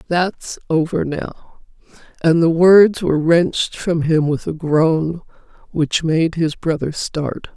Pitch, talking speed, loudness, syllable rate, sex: 160 Hz, 145 wpm, -17 LUFS, 3.6 syllables/s, female